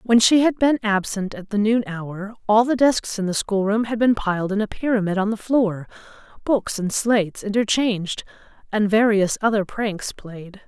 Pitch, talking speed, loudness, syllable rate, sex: 210 Hz, 185 wpm, -21 LUFS, 4.7 syllables/s, female